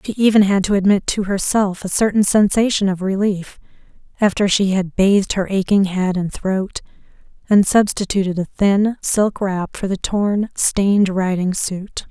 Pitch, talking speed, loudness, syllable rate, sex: 195 Hz, 165 wpm, -17 LUFS, 4.5 syllables/s, female